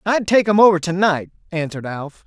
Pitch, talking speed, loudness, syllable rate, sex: 180 Hz, 185 wpm, -17 LUFS, 5.7 syllables/s, male